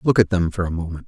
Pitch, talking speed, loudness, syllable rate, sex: 95 Hz, 335 wpm, -21 LUFS, 7.2 syllables/s, male